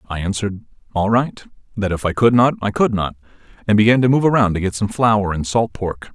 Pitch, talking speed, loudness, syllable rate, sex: 105 Hz, 235 wpm, -18 LUFS, 5.8 syllables/s, male